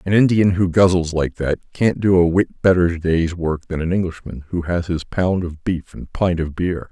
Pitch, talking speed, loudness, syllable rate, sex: 85 Hz, 225 wpm, -19 LUFS, 4.7 syllables/s, male